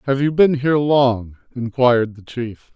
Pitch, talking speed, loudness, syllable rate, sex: 125 Hz, 175 wpm, -18 LUFS, 4.5 syllables/s, male